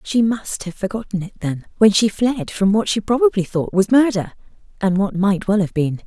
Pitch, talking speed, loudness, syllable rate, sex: 205 Hz, 220 wpm, -18 LUFS, 5.0 syllables/s, female